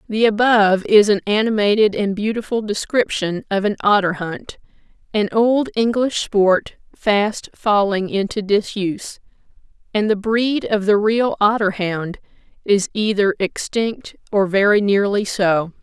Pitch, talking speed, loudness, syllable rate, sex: 210 Hz, 135 wpm, -18 LUFS, 4.1 syllables/s, female